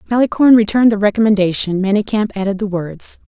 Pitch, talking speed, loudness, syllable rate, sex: 205 Hz, 145 wpm, -14 LUFS, 6.7 syllables/s, female